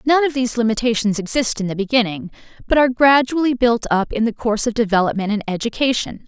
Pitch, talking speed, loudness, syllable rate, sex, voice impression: 235 Hz, 190 wpm, -18 LUFS, 6.5 syllables/s, female, feminine, adult-like, tensed, powerful, bright, clear, fluent, intellectual, friendly, slightly elegant, lively, slightly kind